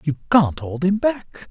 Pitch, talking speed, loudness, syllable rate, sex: 175 Hz, 200 wpm, -19 LUFS, 3.9 syllables/s, male